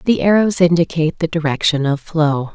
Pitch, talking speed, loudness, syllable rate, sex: 165 Hz, 165 wpm, -16 LUFS, 5.4 syllables/s, female